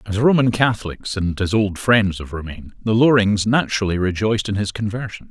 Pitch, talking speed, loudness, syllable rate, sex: 105 Hz, 180 wpm, -19 LUFS, 5.8 syllables/s, male